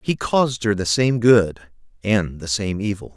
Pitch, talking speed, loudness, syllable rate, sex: 105 Hz, 190 wpm, -19 LUFS, 4.6 syllables/s, male